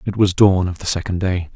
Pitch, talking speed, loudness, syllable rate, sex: 95 Hz, 270 wpm, -18 LUFS, 5.7 syllables/s, male